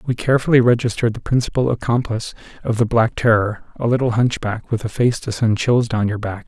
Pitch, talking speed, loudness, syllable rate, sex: 115 Hz, 205 wpm, -18 LUFS, 6.1 syllables/s, male